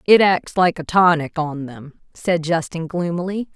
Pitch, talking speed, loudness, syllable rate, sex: 170 Hz, 170 wpm, -19 LUFS, 4.3 syllables/s, female